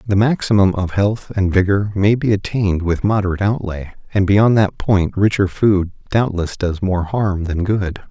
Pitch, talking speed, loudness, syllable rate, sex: 100 Hz, 180 wpm, -17 LUFS, 4.7 syllables/s, male